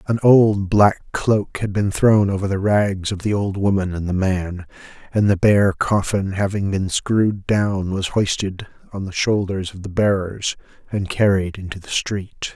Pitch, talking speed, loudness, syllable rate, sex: 100 Hz, 180 wpm, -19 LUFS, 4.2 syllables/s, male